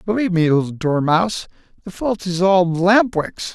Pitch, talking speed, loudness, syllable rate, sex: 185 Hz, 170 wpm, -18 LUFS, 5.0 syllables/s, male